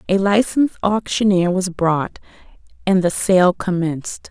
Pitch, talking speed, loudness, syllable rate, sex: 190 Hz, 125 wpm, -18 LUFS, 4.4 syllables/s, female